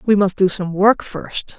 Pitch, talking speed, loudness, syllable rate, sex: 195 Hz, 225 wpm, -17 LUFS, 4.0 syllables/s, female